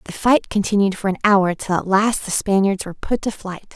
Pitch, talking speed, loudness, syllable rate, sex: 200 Hz, 240 wpm, -19 LUFS, 5.4 syllables/s, female